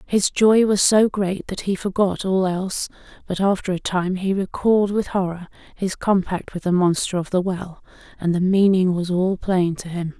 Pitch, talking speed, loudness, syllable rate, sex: 190 Hz, 200 wpm, -20 LUFS, 4.8 syllables/s, female